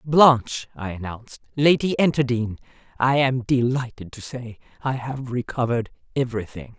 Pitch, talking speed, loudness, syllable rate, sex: 125 Hz, 105 wpm, -22 LUFS, 5.1 syllables/s, female